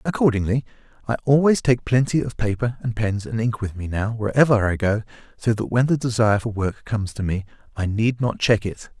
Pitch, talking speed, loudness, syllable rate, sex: 115 Hz, 215 wpm, -21 LUFS, 5.7 syllables/s, male